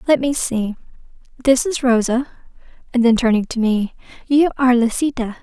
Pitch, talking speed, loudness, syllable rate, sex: 245 Hz, 155 wpm, -18 LUFS, 5.4 syllables/s, female